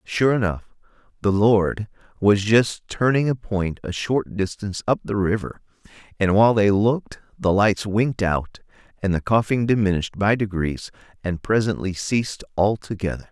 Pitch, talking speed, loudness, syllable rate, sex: 105 Hz, 150 wpm, -21 LUFS, 4.9 syllables/s, male